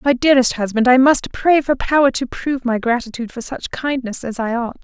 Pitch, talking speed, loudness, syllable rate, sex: 250 Hz, 225 wpm, -17 LUFS, 5.7 syllables/s, female